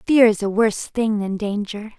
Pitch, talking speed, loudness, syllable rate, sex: 215 Hz, 210 wpm, -20 LUFS, 5.0 syllables/s, female